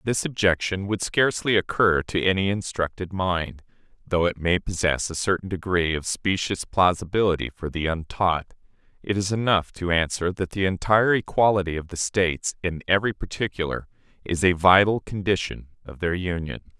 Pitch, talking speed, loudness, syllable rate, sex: 90 Hz, 155 wpm, -23 LUFS, 5.2 syllables/s, male